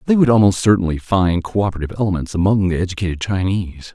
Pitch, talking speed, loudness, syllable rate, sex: 95 Hz, 165 wpm, -17 LUFS, 7.1 syllables/s, male